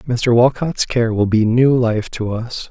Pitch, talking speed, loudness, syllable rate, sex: 120 Hz, 200 wpm, -16 LUFS, 3.8 syllables/s, male